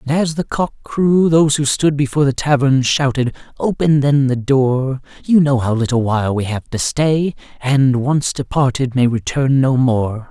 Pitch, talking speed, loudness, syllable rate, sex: 135 Hz, 180 wpm, -16 LUFS, 4.6 syllables/s, male